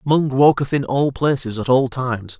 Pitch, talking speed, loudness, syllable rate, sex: 130 Hz, 200 wpm, -18 LUFS, 4.9 syllables/s, male